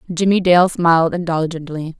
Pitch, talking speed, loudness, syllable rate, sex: 170 Hz, 120 wpm, -16 LUFS, 5.1 syllables/s, female